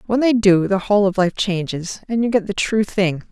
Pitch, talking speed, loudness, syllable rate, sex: 200 Hz, 255 wpm, -18 LUFS, 5.4 syllables/s, female